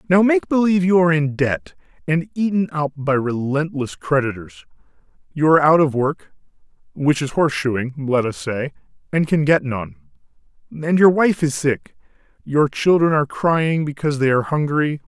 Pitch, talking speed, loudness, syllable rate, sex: 150 Hz, 160 wpm, -19 LUFS, 5.1 syllables/s, male